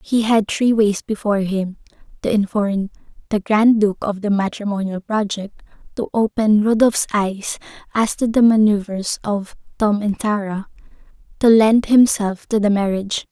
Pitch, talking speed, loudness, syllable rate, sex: 210 Hz, 145 wpm, -18 LUFS, 4.6 syllables/s, female